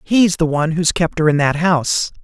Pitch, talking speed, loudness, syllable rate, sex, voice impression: 165 Hz, 240 wpm, -16 LUFS, 5.4 syllables/s, male, slightly masculine, slightly adult-like, slightly fluent, refreshing, slightly sincere, friendly